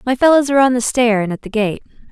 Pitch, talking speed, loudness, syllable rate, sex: 240 Hz, 285 wpm, -15 LUFS, 6.9 syllables/s, female